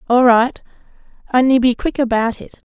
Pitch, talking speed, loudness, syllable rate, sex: 245 Hz, 155 wpm, -15 LUFS, 5.1 syllables/s, female